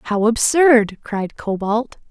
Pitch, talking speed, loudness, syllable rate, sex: 225 Hz, 115 wpm, -17 LUFS, 3.1 syllables/s, female